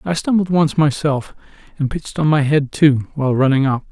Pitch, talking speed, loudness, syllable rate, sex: 145 Hz, 200 wpm, -17 LUFS, 5.5 syllables/s, male